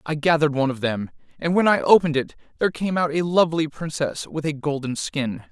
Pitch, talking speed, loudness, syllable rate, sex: 155 Hz, 220 wpm, -22 LUFS, 6.2 syllables/s, male